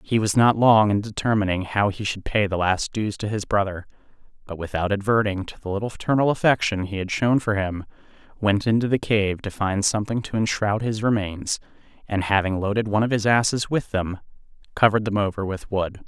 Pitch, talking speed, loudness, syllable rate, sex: 105 Hz, 200 wpm, -22 LUFS, 5.6 syllables/s, male